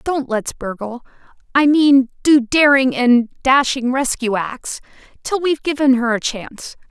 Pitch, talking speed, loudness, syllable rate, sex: 260 Hz, 130 wpm, -16 LUFS, 4.3 syllables/s, female